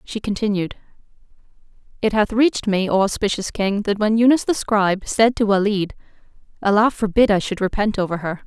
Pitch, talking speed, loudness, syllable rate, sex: 205 Hz, 170 wpm, -19 LUFS, 5.6 syllables/s, female